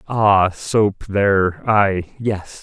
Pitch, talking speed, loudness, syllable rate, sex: 100 Hz, 115 wpm, -17 LUFS, 2.6 syllables/s, male